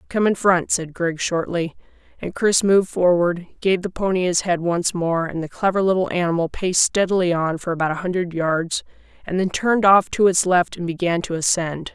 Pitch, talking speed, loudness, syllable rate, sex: 175 Hz, 205 wpm, -20 LUFS, 5.3 syllables/s, female